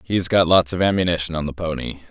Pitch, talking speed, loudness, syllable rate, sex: 85 Hz, 230 wpm, -19 LUFS, 6.2 syllables/s, male